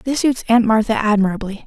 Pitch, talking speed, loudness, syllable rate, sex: 225 Hz, 180 wpm, -17 LUFS, 5.6 syllables/s, female